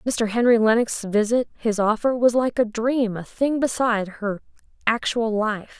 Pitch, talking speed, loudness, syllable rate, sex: 225 Hz, 145 wpm, -22 LUFS, 4.5 syllables/s, female